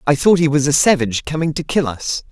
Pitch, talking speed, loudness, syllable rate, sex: 145 Hz, 260 wpm, -16 LUFS, 6.1 syllables/s, male